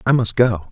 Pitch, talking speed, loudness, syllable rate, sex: 110 Hz, 255 wpm, -17 LUFS, 5.2 syllables/s, male